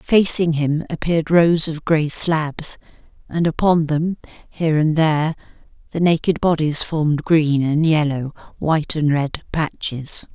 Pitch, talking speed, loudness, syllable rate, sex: 155 Hz, 140 wpm, -19 LUFS, 4.2 syllables/s, female